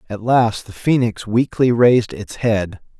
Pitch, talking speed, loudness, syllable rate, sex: 115 Hz, 160 wpm, -17 LUFS, 4.2 syllables/s, male